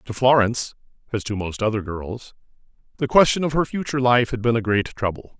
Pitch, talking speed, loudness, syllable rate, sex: 115 Hz, 200 wpm, -21 LUFS, 5.8 syllables/s, male